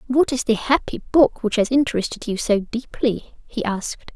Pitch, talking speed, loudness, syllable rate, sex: 240 Hz, 190 wpm, -21 LUFS, 5.2 syllables/s, female